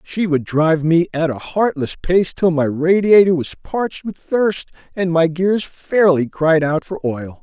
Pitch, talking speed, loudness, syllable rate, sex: 170 Hz, 185 wpm, -17 LUFS, 4.2 syllables/s, male